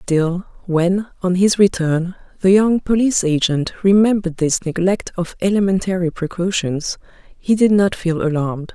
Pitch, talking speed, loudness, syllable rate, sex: 180 Hz, 135 wpm, -17 LUFS, 4.7 syllables/s, female